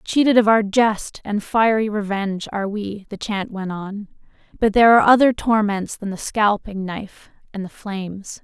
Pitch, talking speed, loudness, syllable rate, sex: 210 Hz, 180 wpm, -19 LUFS, 4.9 syllables/s, female